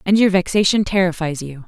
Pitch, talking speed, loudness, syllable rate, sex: 180 Hz, 180 wpm, -17 LUFS, 5.8 syllables/s, female